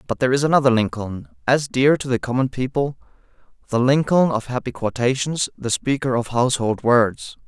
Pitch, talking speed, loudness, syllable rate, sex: 130 Hz, 160 wpm, -20 LUFS, 5.4 syllables/s, male